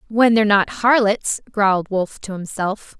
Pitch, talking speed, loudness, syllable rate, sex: 210 Hz, 180 wpm, -18 LUFS, 4.9 syllables/s, female